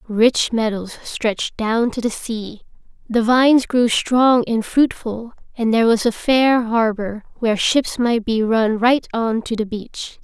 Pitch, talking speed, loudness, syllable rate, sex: 230 Hz, 170 wpm, -18 LUFS, 4.0 syllables/s, female